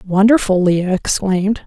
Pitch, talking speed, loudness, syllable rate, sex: 195 Hz, 110 wpm, -15 LUFS, 4.7 syllables/s, female